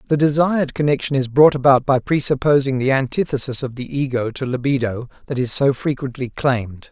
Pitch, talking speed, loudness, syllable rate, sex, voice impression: 135 Hz, 175 wpm, -19 LUFS, 5.7 syllables/s, male, very masculine, middle-aged, thick, slightly tensed, powerful, slightly bright, soft, clear, slightly fluent, slightly raspy, slightly cool, intellectual, refreshing, sincere, calm, slightly mature, friendly, reassuring, slightly unique, slightly elegant, slightly wild, slightly sweet, lively, kind, slightly intense